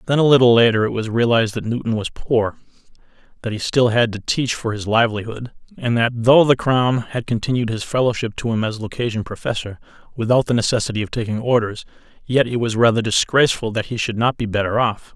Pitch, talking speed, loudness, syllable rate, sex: 115 Hz, 205 wpm, -19 LUFS, 6.0 syllables/s, male